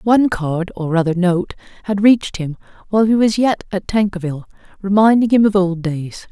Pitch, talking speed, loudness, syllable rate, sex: 195 Hz, 180 wpm, -16 LUFS, 5.4 syllables/s, female